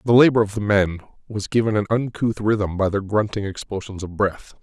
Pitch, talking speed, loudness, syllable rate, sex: 105 Hz, 210 wpm, -21 LUFS, 5.4 syllables/s, male